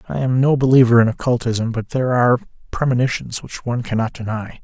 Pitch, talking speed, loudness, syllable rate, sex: 120 Hz, 180 wpm, -18 LUFS, 6.3 syllables/s, male